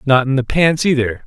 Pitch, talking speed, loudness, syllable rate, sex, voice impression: 135 Hz, 235 wpm, -15 LUFS, 5.3 syllables/s, male, masculine, very adult-like, slightly thick, cool, intellectual, slightly calm, slightly kind